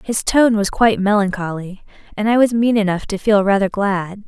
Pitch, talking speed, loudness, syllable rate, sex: 205 Hz, 195 wpm, -16 LUFS, 5.2 syllables/s, female